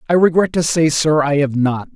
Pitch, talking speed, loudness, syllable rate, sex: 155 Hz, 245 wpm, -15 LUFS, 5.2 syllables/s, male